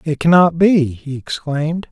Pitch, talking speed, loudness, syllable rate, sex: 155 Hz, 155 wpm, -15 LUFS, 4.4 syllables/s, male